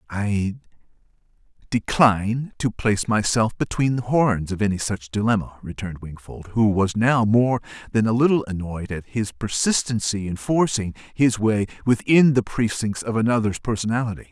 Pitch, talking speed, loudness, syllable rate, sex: 110 Hz, 145 wpm, -22 LUFS, 5.0 syllables/s, male